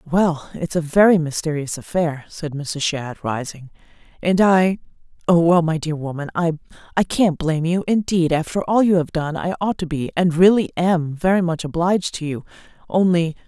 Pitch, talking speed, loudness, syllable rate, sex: 165 Hz, 155 wpm, -19 LUFS, 5.0 syllables/s, female